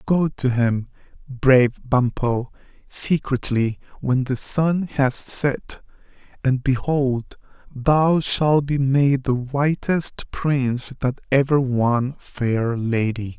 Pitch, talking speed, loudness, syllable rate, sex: 130 Hz, 110 wpm, -21 LUFS, 3.1 syllables/s, male